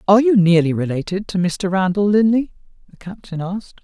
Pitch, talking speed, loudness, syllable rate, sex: 190 Hz, 170 wpm, -17 LUFS, 5.7 syllables/s, female